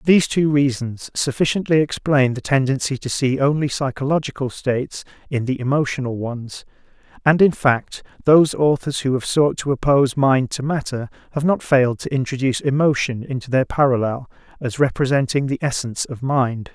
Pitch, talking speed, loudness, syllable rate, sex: 135 Hz, 160 wpm, -19 LUFS, 5.4 syllables/s, male